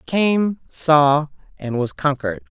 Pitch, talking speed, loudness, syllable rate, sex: 150 Hz, 140 wpm, -19 LUFS, 3.9 syllables/s, female